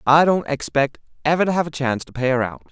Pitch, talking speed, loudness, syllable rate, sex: 140 Hz, 265 wpm, -20 LUFS, 6.6 syllables/s, male